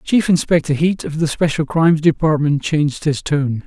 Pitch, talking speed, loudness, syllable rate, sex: 155 Hz, 180 wpm, -17 LUFS, 5.1 syllables/s, male